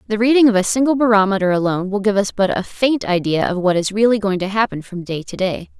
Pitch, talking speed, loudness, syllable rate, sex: 205 Hz, 260 wpm, -17 LUFS, 6.3 syllables/s, female